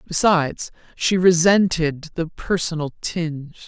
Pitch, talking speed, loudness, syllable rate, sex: 165 Hz, 100 wpm, -20 LUFS, 4.0 syllables/s, female